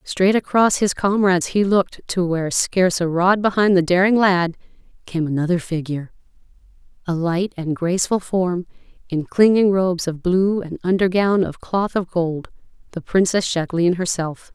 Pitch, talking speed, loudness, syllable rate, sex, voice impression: 180 Hz, 155 wpm, -19 LUFS, 5.1 syllables/s, female, very feminine, adult-like, slightly clear, intellectual, slightly strict